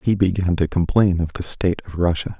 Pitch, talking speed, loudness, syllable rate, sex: 90 Hz, 225 wpm, -20 LUFS, 5.8 syllables/s, male